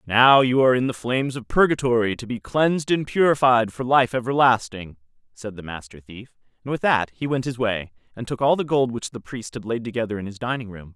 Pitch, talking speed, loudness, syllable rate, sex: 120 Hz, 230 wpm, -21 LUFS, 5.8 syllables/s, male